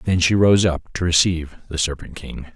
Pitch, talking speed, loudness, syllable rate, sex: 85 Hz, 210 wpm, -19 LUFS, 5.3 syllables/s, male